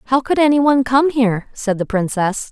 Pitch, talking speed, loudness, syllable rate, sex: 245 Hz, 215 wpm, -16 LUFS, 5.8 syllables/s, female